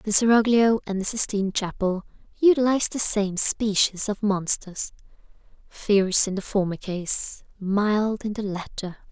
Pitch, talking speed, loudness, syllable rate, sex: 205 Hz, 140 wpm, -23 LUFS, 4.4 syllables/s, female